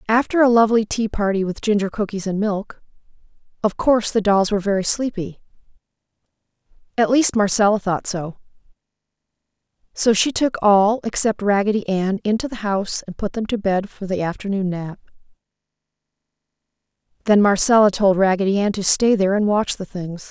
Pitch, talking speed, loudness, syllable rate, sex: 205 Hz, 155 wpm, -19 LUFS, 5.6 syllables/s, female